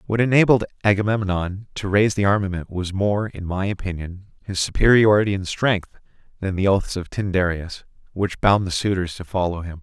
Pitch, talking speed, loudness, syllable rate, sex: 100 Hz, 170 wpm, -21 LUFS, 5.4 syllables/s, male